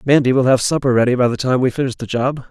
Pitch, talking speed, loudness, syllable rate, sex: 130 Hz, 285 wpm, -16 LUFS, 7.0 syllables/s, male